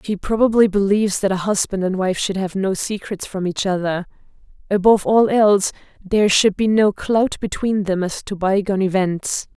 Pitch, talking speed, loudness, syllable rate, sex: 200 Hz, 180 wpm, -18 LUFS, 5.3 syllables/s, female